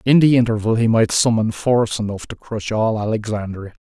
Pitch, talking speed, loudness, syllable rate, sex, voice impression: 110 Hz, 190 wpm, -18 LUFS, 5.5 syllables/s, male, very masculine, very adult-like, slightly old, very thick, very relaxed, slightly weak, slightly dark, slightly soft, muffled, slightly fluent, cool, very intellectual, sincere, very calm, very mature, slightly friendly, reassuring, slightly elegant, wild, slightly strict, modest